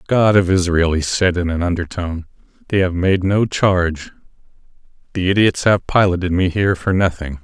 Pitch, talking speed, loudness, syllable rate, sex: 90 Hz, 170 wpm, -17 LUFS, 5.3 syllables/s, male